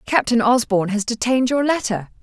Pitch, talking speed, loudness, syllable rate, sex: 235 Hz, 160 wpm, -19 LUFS, 5.5 syllables/s, female